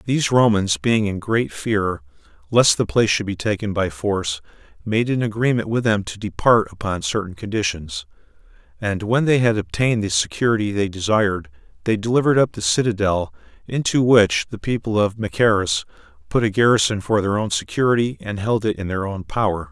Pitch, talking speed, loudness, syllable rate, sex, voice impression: 105 Hz, 175 wpm, -20 LUFS, 5.5 syllables/s, male, very masculine, very adult-like, very middle-aged, thick, tensed, powerful, slightly dark, slightly hard, clear, fluent, cool, very intellectual, slightly refreshing, sincere, very calm, mature, very friendly, very reassuring, unique, elegant, very wild, sweet, slightly lively, very kind, modest